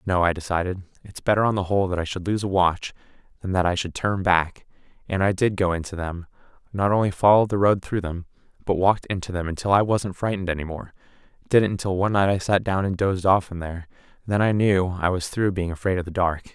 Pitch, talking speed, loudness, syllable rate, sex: 95 Hz, 230 wpm, -23 LUFS, 6.4 syllables/s, male